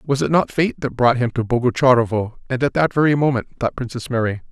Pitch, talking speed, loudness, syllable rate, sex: 125 Hz, 225 wpm, -19 LUFS, 6.0 syllables/s, male